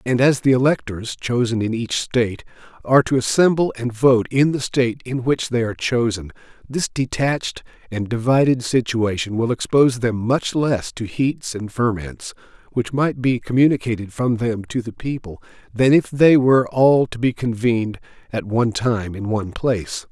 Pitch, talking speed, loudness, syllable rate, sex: 120 Hz, 175 wpm, -19 LUFS, 4.9 syllables/s, male